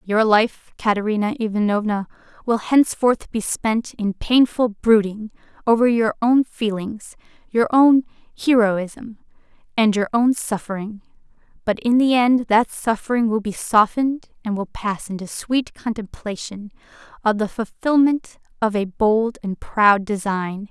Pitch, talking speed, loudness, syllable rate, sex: 220 Hz, 135 wpm, -20 LUFS, 4.2 syllables/s, female